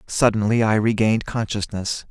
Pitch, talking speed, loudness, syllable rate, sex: 110 Hz, 115 wpm, -20 LUFS, 5.1 syllables/s, male